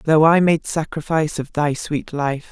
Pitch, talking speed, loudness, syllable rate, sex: 155 Hz, 190 wpm, -19 LUFS, 4.5 syllables/s, female